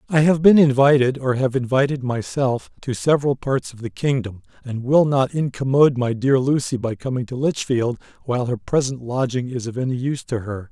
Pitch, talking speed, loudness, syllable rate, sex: 130 Hz, 195 wpm, -20 LUFS, 5.4 syllables/s, male